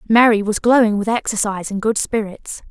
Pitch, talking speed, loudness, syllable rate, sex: 215 Hz, 175 wpm, -17 LUFS, 5.7 syllables/s, female